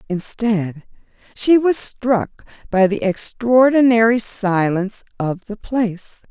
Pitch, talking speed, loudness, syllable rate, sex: 215 Hz, 105 wpm, -17 LUFS, 3.7 syllables/s, female